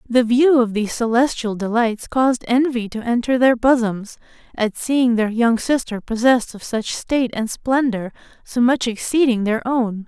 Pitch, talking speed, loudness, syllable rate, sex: 235 Hz, 165 wpm, -18 LUFS, 4.7 syllables/s, female